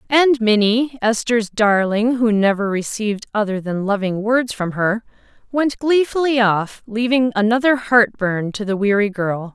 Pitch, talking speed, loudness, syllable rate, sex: 220 Hz, 130 wpm, -18 LUFS, 4.4 syllables/s, female